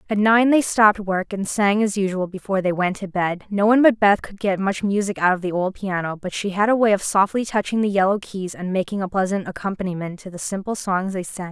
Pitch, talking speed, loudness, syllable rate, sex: 195 Hz, 255 wpm, -21 LUFS, 5.9 syllables/s, female